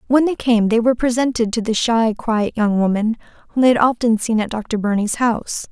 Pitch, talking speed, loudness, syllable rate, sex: 230 Hz, 220 wpm, -18 LUFS, 5.5 syllables/s, female